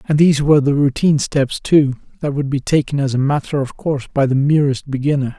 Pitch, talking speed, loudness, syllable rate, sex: 140 Hz, 225 wpm, -16 LUFS, 6.1 syllables/s, male